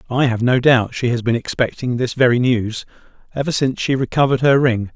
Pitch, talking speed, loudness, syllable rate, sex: 125 Hz, 205 wpm, -17 LUFS, 5.9 syllables/s, male